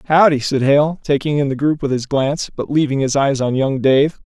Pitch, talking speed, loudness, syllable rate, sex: 140 Hz, 240 wpm, -16 LUFS, 5.3 syllables/s, male